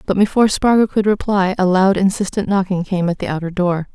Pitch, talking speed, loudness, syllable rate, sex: 190 Hz, 215 wpm, -16 LUFS, 5.9 syllables/s, female